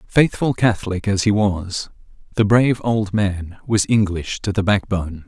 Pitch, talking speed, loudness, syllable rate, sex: 100 Hz, 160 wpm, -19 LUFS, 4.6 syllables/s, male